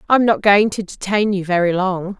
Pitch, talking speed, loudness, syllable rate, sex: 195 Hz, 220 wpm, -17 LUFS, 5.0 syllables/s, female